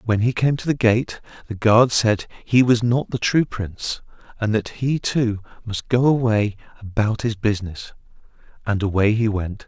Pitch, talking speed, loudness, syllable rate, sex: 110 Hz, 185 wpm, -20 LUFS, 4.7 syllables/s, male